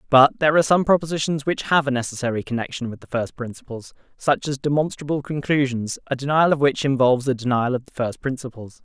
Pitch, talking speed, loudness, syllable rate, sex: 135 Hz, 195 wpm, -21 LUFS, 6.3 syllables/s, male